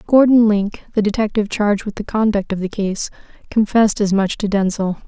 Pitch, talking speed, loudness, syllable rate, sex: 205 Hz, 190 wpm, -17 LUFS, 5.8 syllables/s, female